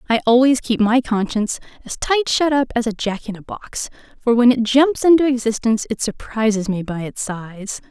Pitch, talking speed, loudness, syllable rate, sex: 235 Hz, 205 wpm, -18 LUFS, 5.2 syllables/s, female